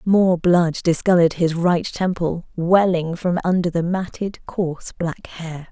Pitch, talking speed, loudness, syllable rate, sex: 175 Hz, 145 wpm, -20 LUFS, 4.1 syllables/s, female